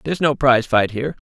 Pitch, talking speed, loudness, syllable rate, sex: 130 Hz, 235 wpm, -18 LUFS, 7.5 syllables/s, male